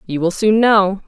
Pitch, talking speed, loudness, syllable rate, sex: 200 Hz, 225 wpm, -14 LUFS, 4.3 syllables/s, female